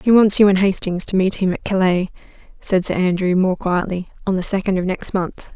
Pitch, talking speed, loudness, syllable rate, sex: 190 Hz, 225 wpm, -18 LUFS, 5.3 syllables/s, female